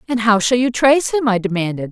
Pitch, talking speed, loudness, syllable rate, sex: 225 Hz, 250 wpm, -16 LUFS, 6.4 syllables/s, female